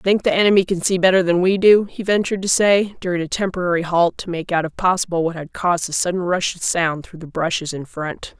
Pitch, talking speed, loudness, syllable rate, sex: 180 Hz, 245 wpm, -18 LUFS, 5.9 syllables/s, female